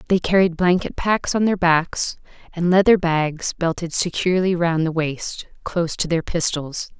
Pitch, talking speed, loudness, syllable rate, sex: 170 Hz, 165 wpm, -20 LUFS, 4.5 syllables/s, female